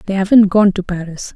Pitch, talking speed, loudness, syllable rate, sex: 195 Hz, 220 wpm, -13 LUFS, 5.9 syllables/s, female